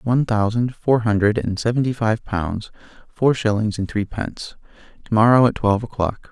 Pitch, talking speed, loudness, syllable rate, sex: 110 Hz, 150 wpm, -20 LUFS, 5.2 syllables/s, male